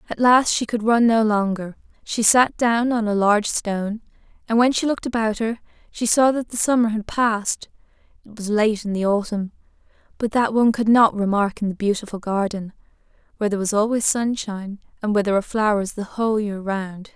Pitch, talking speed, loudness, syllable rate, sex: 215 Hz, 200 wpm, -20 LUFS, 5.8 syllables/s, female